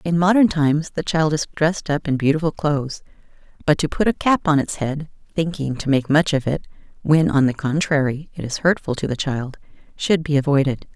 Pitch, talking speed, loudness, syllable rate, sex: 150 Hz, 210 wpm, -20 LUFS, 5.6 syllables/s, female